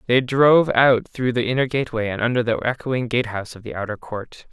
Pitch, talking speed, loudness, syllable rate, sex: 120 Hz, 210 wpm, -20 LUFS, 6.0 syllables/s, male